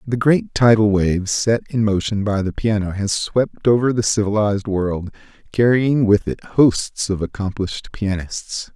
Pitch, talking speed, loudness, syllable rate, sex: 105 Hz, 160 wpm, -18 LUFS, 4.3 syllables/s, male